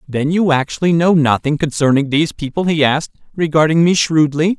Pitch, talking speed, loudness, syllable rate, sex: 155 Hz, 170 wpm, -15 LUFS, 5.7 syllables/s, male